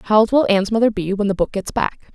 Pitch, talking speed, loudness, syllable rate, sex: 210 Hz, 310 wpm, -18 LUFS, 5.9 syllables/s, female